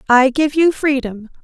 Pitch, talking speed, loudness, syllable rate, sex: 270 Hz, 165 wpm, -15 LUFS, 4.4 syllables/s, female